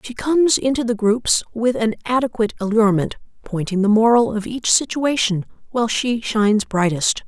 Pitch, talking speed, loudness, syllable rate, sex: 225 Hz, 155 wpm, -18 LUFS, 5.3 syllables/s, female